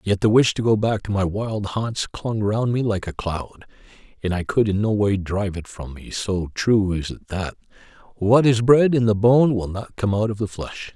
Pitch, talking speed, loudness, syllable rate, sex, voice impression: 105 Hz, 240 wpm, -21 LUFS, 4.7 syllables/s, male, very masculine, very adult-like, very thick, very tensed, very powerful, slightly dark, soft, very clear, fluent, very cool, very intellectual, very sincere, very calm, very mature, friendly, very reassuring, very unique, slightly elegant, very wild, sweet, very lively, kind, intense, slightly modest